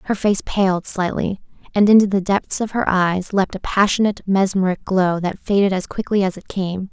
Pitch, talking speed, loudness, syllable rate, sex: 195 Hz, 200 wpm, -19 LUFS, 5.1 syllables/s, female